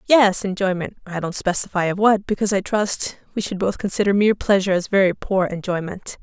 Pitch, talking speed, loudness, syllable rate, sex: 195 Hz, 185 wpm, -20 LUFS, 5.7 syllables/s, female